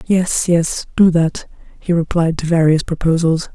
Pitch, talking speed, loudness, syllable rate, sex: 165 Hz, 150 wpm, -16 LUFS, 4.4 syllables/s, female